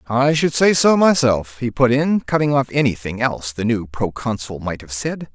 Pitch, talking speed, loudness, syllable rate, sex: 125 Hz, 200 wpm, -18 LUFS, 4.9 syllables/s, male